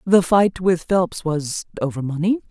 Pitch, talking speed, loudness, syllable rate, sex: 175 Hz, 170 wpm, -20 LUFS, 4.2 syllables/s, female